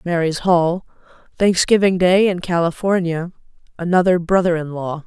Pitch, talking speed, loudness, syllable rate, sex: 175 Hz, 95 wpm, -17 LUFS, 4.7 syllables/s, female